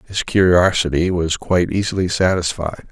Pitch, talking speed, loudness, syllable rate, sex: 90 Hz, 125 wpm, -17 LUFS, 5.0 syllables/s, male